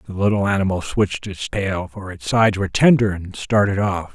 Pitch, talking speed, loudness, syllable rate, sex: 100 Hz, 205 wpm, -19 LUFS, 5.6 syllables/s, male